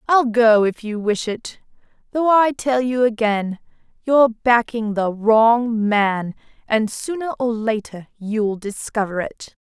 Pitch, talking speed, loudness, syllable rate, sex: 230 Hz, 145 wpm, -19 LUFS, 3.7 syllables/s, female